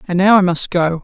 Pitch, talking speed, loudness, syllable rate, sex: 180 Hz, 290 wpm, -14 LUFS, 5.8 syllables/s, female